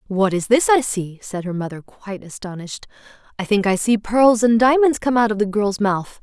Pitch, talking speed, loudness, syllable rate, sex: 215 Hz, 220 wpm, -18 LUFS, 5.3 syllables/s, female